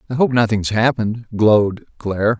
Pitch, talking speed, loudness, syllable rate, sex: 110 Hz, 150 wpm, -17 LUFS, 5.5 syllables/s, male